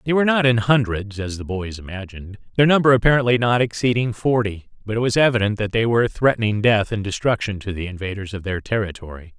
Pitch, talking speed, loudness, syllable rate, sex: 110 Hz, 205 wpm, -20 LUFS, 6.3 syllables/s, male